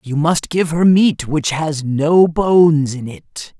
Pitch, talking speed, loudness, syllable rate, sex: 155 Hz, 185 wpm, -15 LUFS, 3.5 syllables/s, male